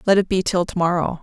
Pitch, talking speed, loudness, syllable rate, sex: 180 Hz, 295 wpm, -20 LUFS, 6.5 syllables/s, female